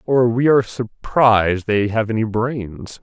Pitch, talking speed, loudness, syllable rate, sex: 115 Hz, 160 wpm, -18 LUFS, 4.1 syllables/s, male